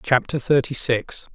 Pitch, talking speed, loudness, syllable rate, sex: 130 Hz, 135 wpm, -21 LUFS, 4.2 syllables/s, male